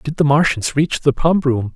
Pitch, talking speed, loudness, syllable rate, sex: 140 Hz, 240 wpm, -16 LUFS, 5.1 syllables/s, male